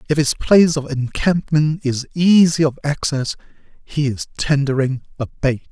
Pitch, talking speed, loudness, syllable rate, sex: 145 Hz, 145 wpm, -18 LUFS, 4.5 syllables/s, male